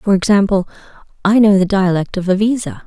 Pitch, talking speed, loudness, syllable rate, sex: 195 Hz, 170 wpm, -14 LUFS, 5.7 syllables/s, female